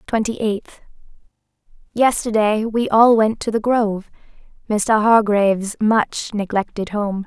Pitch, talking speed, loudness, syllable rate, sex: 215 Hz, 105 wpm, -18 LUFS, 4.1 syllables/s, female